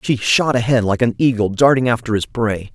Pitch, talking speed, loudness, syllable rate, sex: 115 Hz, 220 wpm, -16 LUFS, 5.3 syllables/s, male